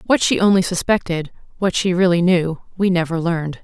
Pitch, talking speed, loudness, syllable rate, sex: 180 Hz, 180 wpm, -18 LUFS, 5.5 syllables/s, female